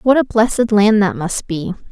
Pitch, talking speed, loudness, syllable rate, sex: 215 Hz, 220 wpm, -15 LUFS, 4.7 syllables/s, female